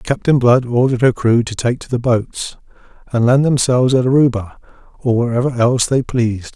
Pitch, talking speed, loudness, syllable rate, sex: 125 Hz, 185 wpm, -15 LUFS, 5.5 syllables/s, male